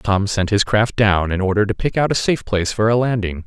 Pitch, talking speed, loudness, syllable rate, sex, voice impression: 105 Hz, 275 wpm, -18 LUFS, 5.8 syllables/s, male, very masculine, very adult-like, slightly middle-aged, very thick, slightly tensed, slightly powerful, bright, soft, clear, fluent, cool, very intellectual, slightly refreshing, very sincere, very calm, mature, very friendly, reassuring, very unique, elegant, slightly sweet, lively, kind